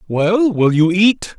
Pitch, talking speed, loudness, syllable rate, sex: 180 Hz, 175 wpm, -14 LUFS, 3.3 syllables/s, male